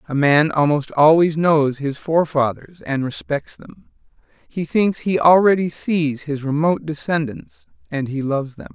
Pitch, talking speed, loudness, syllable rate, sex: 155 Hz, 150 wpm, -18 LUFS, 4.5 syllables/s, male